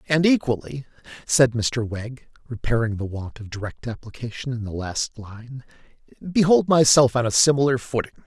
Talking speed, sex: 150 wpm, male